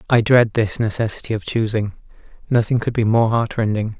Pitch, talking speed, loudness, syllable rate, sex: 110 Hz, 150 wpm, -19 LUFS, 5.5 syllables/s, male